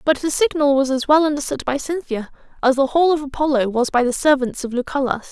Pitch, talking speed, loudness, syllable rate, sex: 280 Hz, 225 wpm, -19 LUFS, 5.9 syllables/s, female